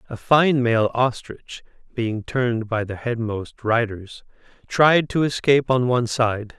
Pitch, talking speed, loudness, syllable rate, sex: 120 Hz, 145 wpm, -20 LUFS, 4.1 syllables/s, male